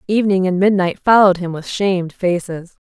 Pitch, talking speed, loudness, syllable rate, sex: 185 Hz, 165 wpm, -16 LUFS, 5.7 syllables/s, female